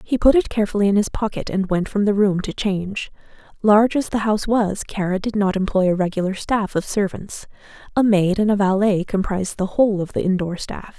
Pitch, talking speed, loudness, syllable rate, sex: 200 Hz, 220 wpm, -20 LUFS, 5.8 syllables/s, female